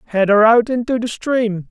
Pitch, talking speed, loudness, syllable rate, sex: 225 Hz, 210 wpm, -15 LUFS, 4.9 syllables/s, female